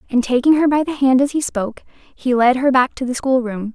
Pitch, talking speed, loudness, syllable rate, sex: 260 Hz, 270 wpm, -17 LUFS, 5.5 syllables/s, female